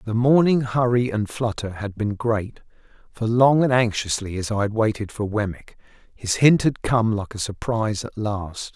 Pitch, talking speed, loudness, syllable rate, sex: 110 Hz, 185 wpm, -22 LUFS, 4.7 syllables/s, male